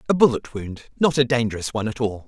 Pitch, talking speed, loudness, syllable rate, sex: 120 Hz, 210 wpm, -22 LUFS, 6.9 syllables/s, male